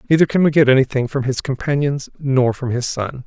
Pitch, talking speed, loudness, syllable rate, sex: 135 Hz, 220 wpm, -18 LUFS, 5.8 syllables/s, male